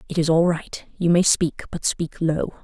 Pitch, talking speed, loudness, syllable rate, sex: 170 Hz, 230 wpm, -21 LUFS, 4.4 syllables/s, female